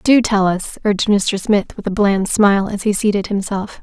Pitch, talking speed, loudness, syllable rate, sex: 205 Hz, 220 wpm, -16 LUFS, 4.8 syllables/s, female